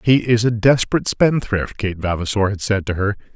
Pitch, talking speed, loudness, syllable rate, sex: 110 Hz, 195 wpm, -18 LUFS, 5.5 syllables/s, male